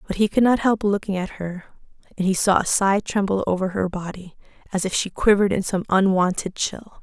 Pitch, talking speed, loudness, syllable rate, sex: 195 Hz, 215 wpm, -21 LUFS, 5.5 syllables/s, female